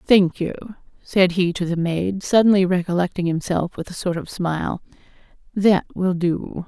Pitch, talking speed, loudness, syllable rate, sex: 180 Hz, 160 wpm, -20 LUFS, 4.7 syllables/s, female